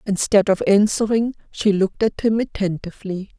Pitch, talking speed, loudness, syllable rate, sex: 205 Hz, 140 wpm, -20 LUFS, 5.3 syllables/s, female